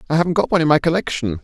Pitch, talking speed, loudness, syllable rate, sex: 155 Hz, 290 wpm, -17 LUFS, 8.8 syllables/s, male